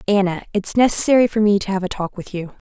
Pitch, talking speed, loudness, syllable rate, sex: 200 Hz, 245 wpm, -18 LUFS, 6.4 syllables/s, female